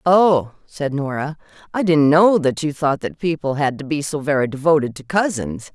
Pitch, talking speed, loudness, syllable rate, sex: 150 Hz, 200 wpm, -19 LUFS, 4.9 syllables/s, female